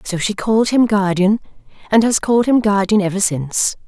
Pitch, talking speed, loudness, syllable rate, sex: 205 Hz, 185 wpm, -16 LUFS, 5.6 syllables/s, female